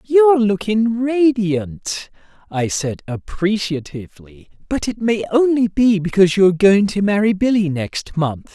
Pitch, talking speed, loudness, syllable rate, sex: 200 Hz, 135 wpm, -17 LUFS, 4.2 syllables/s, male